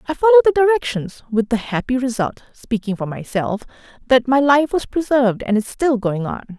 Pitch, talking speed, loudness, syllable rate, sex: 250 Hz, 175 wpm, -18 LUFS, 5.6 syllables/s, female